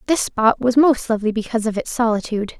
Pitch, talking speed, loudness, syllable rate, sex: 230 Hz, 210 wpm, -18 LUFS, 6.8 syllables/s, female